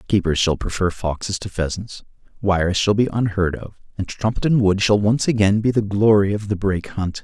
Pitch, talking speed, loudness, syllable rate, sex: 100 Hz, 200 wpm, -20 LUFS, 5.4 syllables/s, male